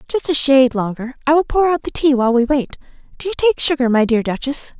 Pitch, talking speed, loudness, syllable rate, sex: 270 Hz, 250 wpm, -16 LUFS, 6.2 syllables/s, female